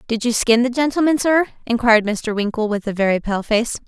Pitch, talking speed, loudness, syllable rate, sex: 235 Hz, 215 wpm, -18 LUFS, 5.8 syllables/s, female